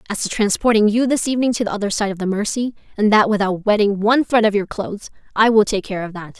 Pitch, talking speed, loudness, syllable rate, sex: 210 Hz, 265 wpm, -18 LUFS, 6.6 syllables/s, female